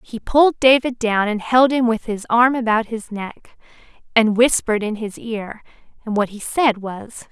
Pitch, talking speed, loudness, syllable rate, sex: 230 Hz, 190 wpm, -18 LUFS, 4.5 syllables/s, female